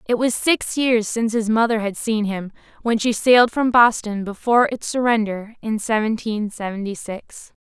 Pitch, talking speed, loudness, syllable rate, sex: 220 Hz, 175 wpm, -19 LUFS, 4.8 syllables/s, female